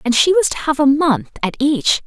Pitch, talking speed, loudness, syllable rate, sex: 275 Hz, 260 wpm, -16 LUFS, 5.1 syllables/s, female